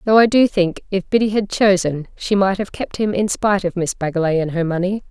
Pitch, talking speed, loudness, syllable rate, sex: 195 Hz, 245 wpm, -18 LUFS, 5.7 syllables/s, female